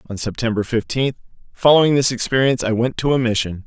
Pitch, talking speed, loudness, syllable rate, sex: 120 Hz, 180 wpm, -18 LUFS, 6.3 syllables/s, male